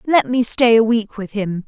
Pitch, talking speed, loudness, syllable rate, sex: 225 Hz, 250 wpm, -16 LUFS, 4.6 syllables/s, female